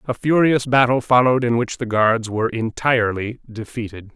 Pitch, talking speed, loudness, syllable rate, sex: 120 Hz, 160 wpm, -18 LUFS, 5.3 syllables/s, male